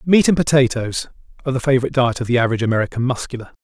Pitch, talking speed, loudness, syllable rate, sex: 125 Hz, 200 wpm, -18 LUFS, 8.4 syllables/s, male